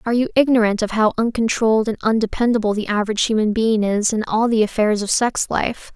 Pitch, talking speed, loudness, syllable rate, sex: 220 Hz, 200 wpm, -18 LUFS, 6.2 syllables/s, female